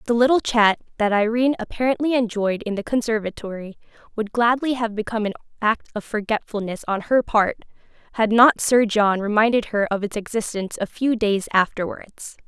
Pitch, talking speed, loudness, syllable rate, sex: 220 Hz, 165 wpm, -21 LUFS, 5.5 syllables/s, female